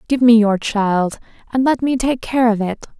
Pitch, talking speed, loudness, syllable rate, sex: 230 Hz, 220 wpm, -16 LUFS, 4.7 syllables/s, female